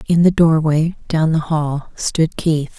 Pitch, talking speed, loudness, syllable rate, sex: 160 Hz, 170 wpm, -17 LUFS, 3.7 syllables/s, female